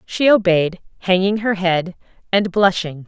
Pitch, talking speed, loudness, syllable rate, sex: 185 Hz, 135 wpm, -17 LUFS, 4.2 syllables/s, female